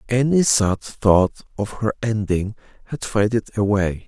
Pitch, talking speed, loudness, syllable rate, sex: 110 Hz, 135 wpm, -20 LUFS, 4.0 syllables/s, male